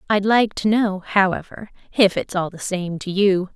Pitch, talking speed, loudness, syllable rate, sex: 195 Hz, 185 wpm, -20 LUFS, 4.6 syllables/s, female